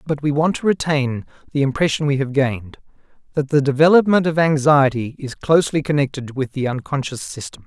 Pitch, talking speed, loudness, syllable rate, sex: 140 Hz, 170 wpm, -18 LUFS, 5.7 syllables/s, male